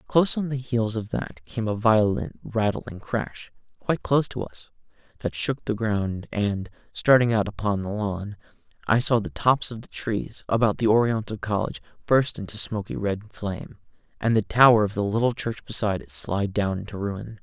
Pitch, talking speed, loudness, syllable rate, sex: 110 Hz, 185 wpm, -24 LUFS, 5.0 syllables/s, male